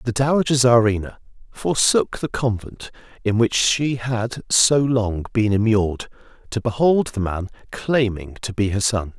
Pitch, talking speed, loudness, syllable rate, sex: 115 Hz, 150 wpm, -20 LUFS, 4.3 syllables/s, male